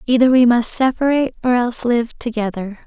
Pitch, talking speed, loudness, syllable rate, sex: 240 Hz, 165 wpm, -16 LUFS, 5.8 syllables/s, female